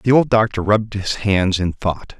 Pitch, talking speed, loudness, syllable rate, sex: 100 Hz, 220 wpm, -18 LUFS, 4.7 syllables/s, male